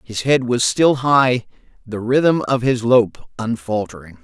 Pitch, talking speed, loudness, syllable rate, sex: 120 Hz, 155 wpm, -17 LUFS, 3.8 syllables/s, male